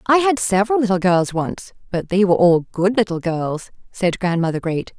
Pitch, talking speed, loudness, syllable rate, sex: 195 Hz, 195 wpm, -18 LUFS, 5.1 syllables/s, female